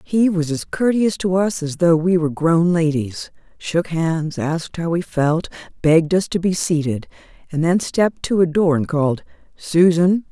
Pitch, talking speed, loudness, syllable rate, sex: 170 Hz, 185 wpm, -18 LUFS, 4.6 syllables/s, female